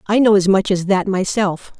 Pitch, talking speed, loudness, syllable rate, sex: 195 Hz, 235 wpm, -16 LUFS, 5.0 syllables/s, female